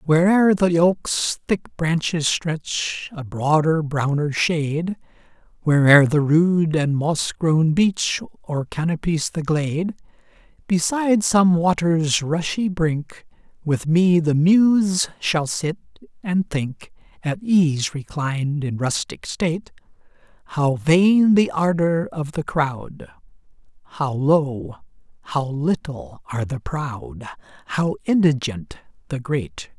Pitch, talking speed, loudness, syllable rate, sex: 160 Hz, 115 wpm, -20 LUFS, 3.5 syllables/s, male